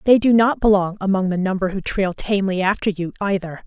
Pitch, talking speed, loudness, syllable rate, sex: 195 Hz, 215 wpm, -19 LUFS, 5.9 syllables/s, female